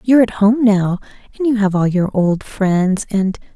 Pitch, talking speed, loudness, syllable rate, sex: 205 Hz, 205 wpm, -16 LUFS, 4.5 syllables/s, female